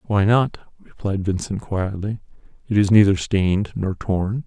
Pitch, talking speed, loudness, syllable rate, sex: 100 Hz, 150 wpm, -20 LUFS, 4.5 syllables/s, male